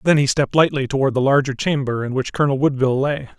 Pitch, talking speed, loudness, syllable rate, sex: 135 Hz, 230 wpm, -19 LUFS, 6.9 syllables/s, male